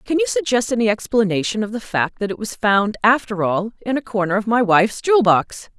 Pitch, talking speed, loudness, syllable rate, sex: 215 Hz, 230 wpm, -18 LUFS, 5.7 syllables/s, female